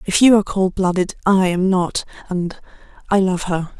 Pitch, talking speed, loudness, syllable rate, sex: 185 Hz, 175 wpm, -18 LUFS, 4.9 syllables/s, female